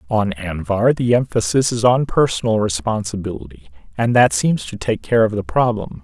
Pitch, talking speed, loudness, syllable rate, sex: 105 Hz, 170 wpm, -18 LUFS, 5.0 syllables/s, male